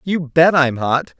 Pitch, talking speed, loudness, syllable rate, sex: 150 Hz, 200 wpm, -15 LUFS, 3.7 syllables/s, male